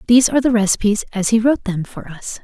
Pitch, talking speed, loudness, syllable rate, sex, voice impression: 220 Hz, 245 wpm, -16 LUFS, 6.9 syllables/s, female, very feminine, young, very thin, tensed, slightly powerful, very bright, soft, muffled, fluent, slightly raspy, very cute, intellectual, very refreshing, sincere, slightly calm, very friendly, very reassuring, very unique, elegant, slightly wild, very sweet, very lively, kind, slightly sharp, slightly modest